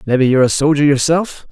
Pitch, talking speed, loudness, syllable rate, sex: 140 Hz, 200 wpm, -13 LUFS, 6.7 syllables/s, male